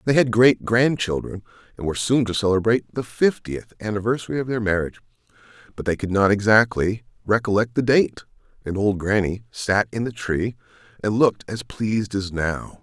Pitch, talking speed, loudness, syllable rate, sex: 110 Hz, 175 wpm, -21 LUFS, 5.5 syllables/s, male